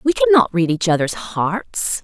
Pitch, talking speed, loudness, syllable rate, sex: 195 Hz, 205 wpm, -17 LUFS, 4.2 syllables/s, female